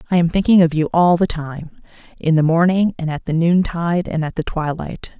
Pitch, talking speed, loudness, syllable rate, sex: 165 Hz, 220 wpm, -17 LUFS, 5.4 syllables/s, female